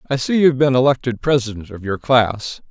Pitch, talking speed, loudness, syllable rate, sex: 125 Hz, 200 wpm, -17 LUFS, 5.8 syllables/s, male